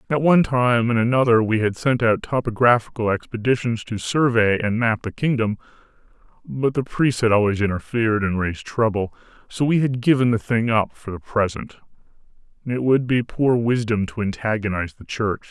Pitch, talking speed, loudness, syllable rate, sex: 115 Hz, 175 wpm, -20 LUFS, 5.3 syllables/s, male